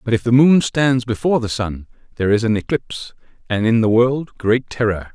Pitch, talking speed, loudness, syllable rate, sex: 115 Hz, 210 wpm, -17 LUFS, 5.5 syllables/s, male